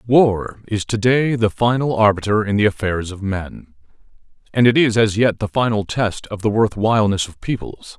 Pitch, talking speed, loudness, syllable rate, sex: 105 Hz, 195 wpm, -18 LUFS, 4.9 syllables/s, male